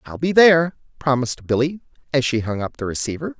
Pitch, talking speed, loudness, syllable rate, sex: 135 Hz, 195 wpm, -20 LUFS, 6.3 syllables/s, male